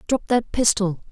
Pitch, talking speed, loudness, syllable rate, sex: 220 Hz, 160 wpm, -21 LUFS, 4.4 syllables/s, female